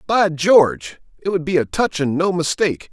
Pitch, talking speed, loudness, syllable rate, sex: 160 Hz, 205 wpm, -18 LUFS, 5.1 syllables/s, male